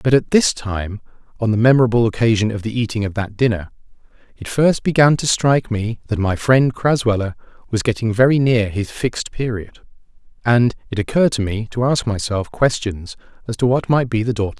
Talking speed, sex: 195 wpm, male